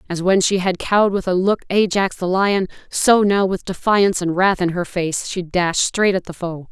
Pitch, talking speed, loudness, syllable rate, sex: 185 Hz, 230 wpm, -18 LUFS, 4.8 syllables/s, female